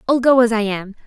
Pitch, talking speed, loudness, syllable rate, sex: 230 Hz, 285 wpm, -16 LUFS, 6.2 syllables/s, female